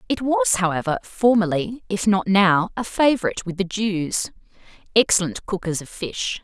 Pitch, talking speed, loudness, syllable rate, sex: 195 Hz, 150 wpm, -21 LUFS, 4.8 syllables/s, female